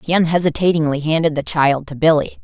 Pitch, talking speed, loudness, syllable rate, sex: 155 Hz, 175 wpm, -16 LUFS, 6.0 syllables/s, female